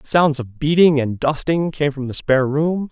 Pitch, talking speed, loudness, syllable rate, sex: 145 Hz, 205 wpm, -18 LUFS, 4.6 syllables/s, male